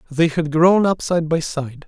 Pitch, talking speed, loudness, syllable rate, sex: 160 Hz, 225 wpm, -18 LUFS, 4.2 syllables/s, male